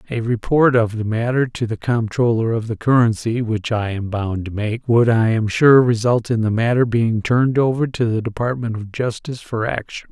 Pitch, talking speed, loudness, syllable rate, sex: 115 Hz, 195 wpm, -18 LUFS, 5.1 syllables/s, male